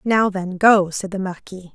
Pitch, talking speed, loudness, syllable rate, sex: 190 Hz, 205 wpm, -18 LUFS, 4.5 syllables/s, female